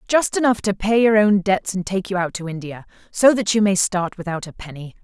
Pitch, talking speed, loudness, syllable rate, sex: 195 Hz, 240 wpm, -19 LUFS, 5.5 syllables/s, female